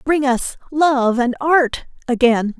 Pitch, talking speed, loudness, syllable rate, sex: 265 Hz, 140 wpm, -17 LUFS, 3.3 syllables/s, female